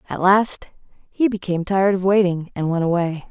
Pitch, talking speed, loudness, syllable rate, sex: 185 Hz, 180 wpm, -19 LUFS, 5.4 syllables/s, female